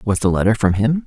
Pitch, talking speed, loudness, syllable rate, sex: 110 Hz, 280 wpm, -17 LUFS, 5.8 syllables/s, male